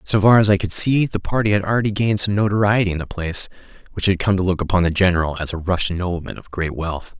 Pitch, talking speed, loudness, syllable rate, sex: 95 Hz, 260 wpm, -19 LUFS, 6.8 syllables/s, male